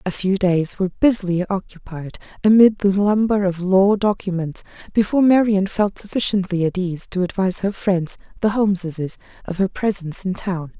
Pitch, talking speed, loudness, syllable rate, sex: 190 Hz, 160 wpm, -19 LUFS, 5.3 syllables/s, female